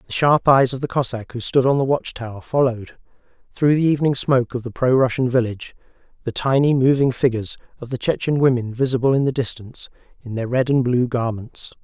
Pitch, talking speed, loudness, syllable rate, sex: 125 Hz, 205 wpm, -19 LUFS, 6.1 syllables/s, male